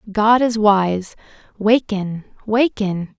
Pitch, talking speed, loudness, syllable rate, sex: 210 Hz, 95 wpm, -18 LUFS, 3.0 syllables/s, female